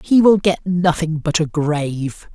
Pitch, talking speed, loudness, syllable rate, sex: 165 Hz, 180 wpm, -18 LUFS, 4.0 syllables/s, male